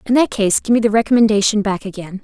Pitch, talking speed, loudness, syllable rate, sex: 215 Hz, 240 wpm, -15 LUFS, 6.6 syllables/s, female